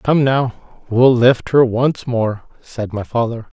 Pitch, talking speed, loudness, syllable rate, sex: 120 Hz, 165 wpm, -16 LUFS, 3.4 syllables/s, male